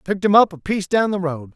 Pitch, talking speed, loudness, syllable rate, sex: 185 Hz, 310 wpm, -18 LUFS, 6.9 syllables/s, male